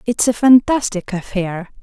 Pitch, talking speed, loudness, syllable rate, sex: 215 Hz, 130 wpm, -16 LUFS, 4.4 syllables/s, female